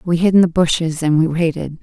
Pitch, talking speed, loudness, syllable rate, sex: 165 Hz, 265 wpm, -16 LUFS, 5.8 syllables/s, female